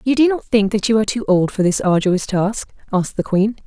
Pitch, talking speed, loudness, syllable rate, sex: 210 Hz, 260 wpm, -17 LUFS, 5.9 syllables/s, female